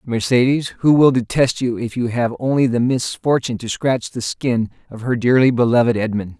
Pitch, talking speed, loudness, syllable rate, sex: 125 Hz, 190 wpm, -18 LUFS, 5.2 syllables/s, male